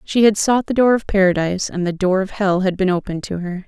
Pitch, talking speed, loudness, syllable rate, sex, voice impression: 195 Hz, 275 wpm, -18 LUFS, 6.2 syllables/s, female, very feminine, adult-like, slightly middle-aged, thin, slightly relaxed, slightly weak, slightly dark, soft, slightly muffled, fluent, slightly raspy, cute, intellectual, slightly refreshing, sincere, calm, friendly, slightly reassuring, unique, elegant, slightly sweet, slightly lively, very modest